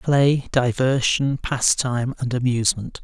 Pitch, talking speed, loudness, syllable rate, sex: 130 Hz, 100 wpm, -20 LUFS, 4.1 syllables/s, male